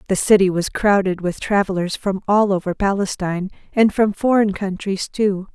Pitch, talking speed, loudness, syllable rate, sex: 195 Hz, 160 wpm, -19 LUFS, 5.0 syllables/s, female